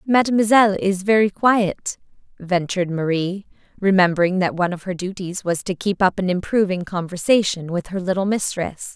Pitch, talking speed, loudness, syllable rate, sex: 190 Hz, 155 wpm, -20 LUFS, 5.3 syllables/s, female